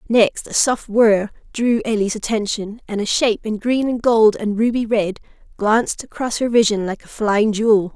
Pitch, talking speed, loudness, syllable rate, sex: 220 Hz, 190 wpm, -18 LUFS, 4.8 syllables/s, female